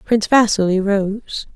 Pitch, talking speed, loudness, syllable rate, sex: 205 Hz, 115 wpm, -16 LUFS, 4.3 syllables/s, female